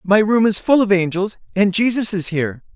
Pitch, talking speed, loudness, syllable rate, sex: 200 Hz, 220 wpm, -17 LUFS, 5.4 syllables/s, male